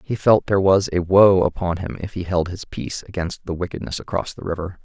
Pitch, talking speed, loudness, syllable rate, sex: 95 Hz, 235 wpm, -20 LUFS, 5.8 syllables/s, male